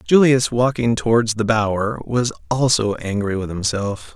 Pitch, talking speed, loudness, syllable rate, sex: 115 Hz, 145 wpm, -19 LUFS, 4.4 syllables/s, male